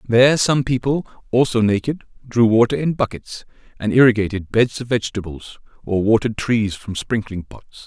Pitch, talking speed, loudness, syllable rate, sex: 115 Hz, 155 wpm, -18 LUFS, 5.4 syllables/s, male